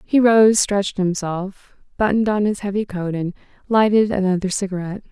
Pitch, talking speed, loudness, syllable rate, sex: 200 Hz, 155 wpm, -19 LUFS, 5.4 syllables/s, female